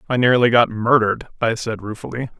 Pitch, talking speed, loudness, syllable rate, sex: 115 Hz, 175 wpm, -18 LUFS, 6.0 syllables/s, male